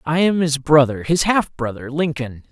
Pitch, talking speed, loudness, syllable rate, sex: 150 Hz, 165 wpm, -18 LUFS, 4.6 syllables/s, male